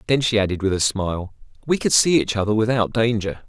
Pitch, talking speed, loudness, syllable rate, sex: 110 Hz, 225 wpm, -20 LUFS, 6.1 syllables/s, male